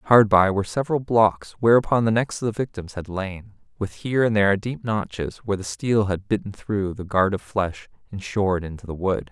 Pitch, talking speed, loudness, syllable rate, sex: 100 Hz, 220 wpm, -23 LUFS, 5.3 syllables/s, male